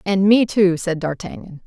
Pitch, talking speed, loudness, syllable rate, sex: 180 Hz, 180 wpm, -17 LUFS, 4.6 syllables/s, female